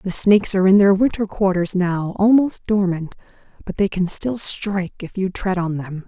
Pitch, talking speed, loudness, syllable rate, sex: 190 Hz, 200 wpm, -18 LUFS, 4.9 syllables/s, female